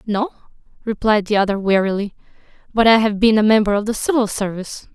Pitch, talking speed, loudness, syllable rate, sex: 215 Hz, 180 wpm, -17 LUFS, 6.3 syllables/s, female